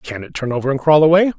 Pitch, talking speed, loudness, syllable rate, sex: 145 Hz, 305 wpm, -15 LUFS, 6.8 syllables/s, male